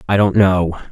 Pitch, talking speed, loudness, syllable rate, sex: 95 Hz, 195 wpm, -15 LUFS, 4.6 syllables/s, male